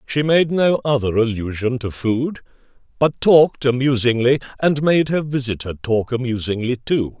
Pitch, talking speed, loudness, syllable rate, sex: 130 Hz, 140 wpm, -18 LUFS, 4.7 syllables/s, male